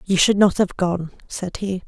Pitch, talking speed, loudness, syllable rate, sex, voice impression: 185 Hz, 225 wpm, -20 LUFS, 4.3 syllables/s, female, feminine, adult-like, relaxed, weak, slightly dark, muffled, slightly raspy, slightly sincere, calm, friendly, kind, modest